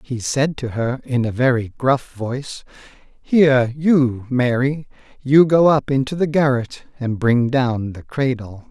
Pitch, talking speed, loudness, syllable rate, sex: 130 Hz, 160 wpm, -18 LUFS, 4.0 syllables/s, male